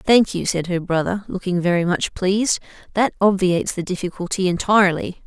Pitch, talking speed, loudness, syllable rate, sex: 185 Hz, 160 wpm, -20 LUFS, 5.5 syllables/s, female